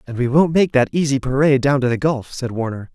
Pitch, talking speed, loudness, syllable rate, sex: 135 Hz, 265 wpm, -18 LUFS, 6.2 syllables/s, male